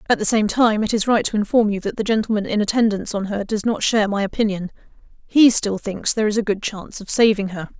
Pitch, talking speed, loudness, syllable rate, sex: 210 Hz, 255 wpm, -19 LUFS, 6.4 syllables/s, female